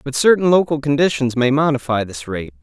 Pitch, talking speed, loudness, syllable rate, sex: 135 Hz, 185 wpm, -17 LUFS, 5.7 syllables/s, male